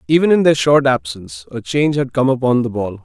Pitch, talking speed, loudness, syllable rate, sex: 135 Hz, 235 wpm, -15 LUFS, 6.0 syllables/s, male